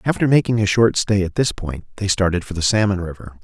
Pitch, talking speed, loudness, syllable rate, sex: 100 Hz, 245 wpm, -18 LUFS, 6.1 syllables/s, male